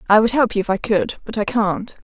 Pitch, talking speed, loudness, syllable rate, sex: 215 Hz, 285 wpm, -19 LUFS, 5.6 syllables/s, female